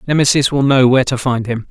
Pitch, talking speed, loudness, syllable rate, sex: 130 Hz, 245 wpm, -14 LUFS, 6.5 syllables/s, male